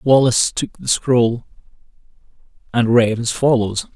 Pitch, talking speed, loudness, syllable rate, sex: 120 Hz, 120 wpm, -17 LUFS, 4.2 syllables/s, male